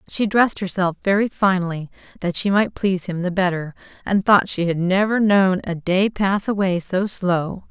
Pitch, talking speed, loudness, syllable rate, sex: 190 Hz, 185 wpm, -20 LUFS, 4.8 syllables/s, female